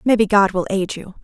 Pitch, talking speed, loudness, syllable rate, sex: 200 Hz, 240 wpm, -18 LUFS, 5.8 syllables/s, female